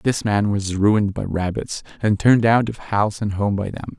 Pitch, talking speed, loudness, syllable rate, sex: 105 Hz, 225 wpm, -20 LUFS, 5.0 syllables/s, male